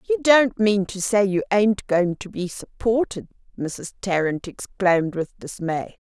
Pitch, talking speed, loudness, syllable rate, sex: 200 Hz, 160 wpm, -22 LUFS, 4.1 syllables/s, female